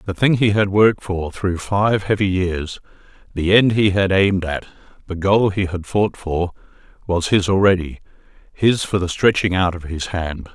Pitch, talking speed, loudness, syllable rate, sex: 95 Hz, 180 wpm, -18 LUFS, 4.7 syllables/s, male